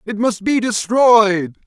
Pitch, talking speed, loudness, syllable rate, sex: 215 Hz, 145 wpm, -15 LUFS, 3.4 syllables/s, male